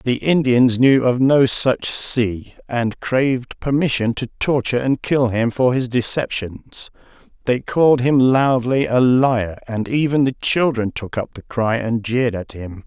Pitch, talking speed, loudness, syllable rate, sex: 125 Hz, 170 wpm, -18 LUFS, 4.1 syllables/s, male